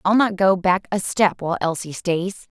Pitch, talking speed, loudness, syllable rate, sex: 185 Hz, 210 wpm, -20 LUFS, 4.7 syllables/s, female